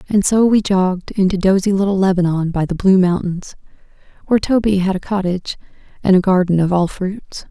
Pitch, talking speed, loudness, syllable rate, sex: 190 Hz, 185 wpm, -16 LUFS, 5.7 syllables/s, female